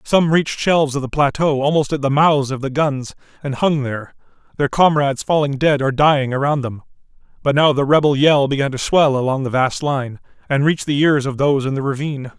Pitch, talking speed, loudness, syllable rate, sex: 140 Hz, 220 wpm, -17 LUFS, 5.8 syllables/s, male